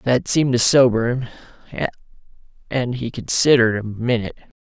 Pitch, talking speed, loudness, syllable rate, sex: 120 Hz, 130 wpm, -19 LUFS, 5.3 syllables/s, male